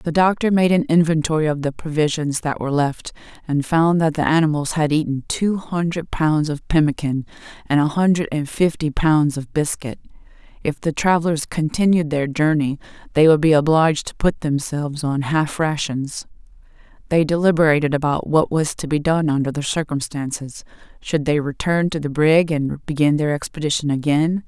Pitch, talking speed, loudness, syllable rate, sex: 155 Hz, 170 wpm, -19 LUFS, 5.1 syllables/s, female